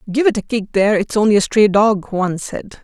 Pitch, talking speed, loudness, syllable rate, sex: 210 Hz, 210 wpm, -16 LUFS, 6.1 syllables/s, female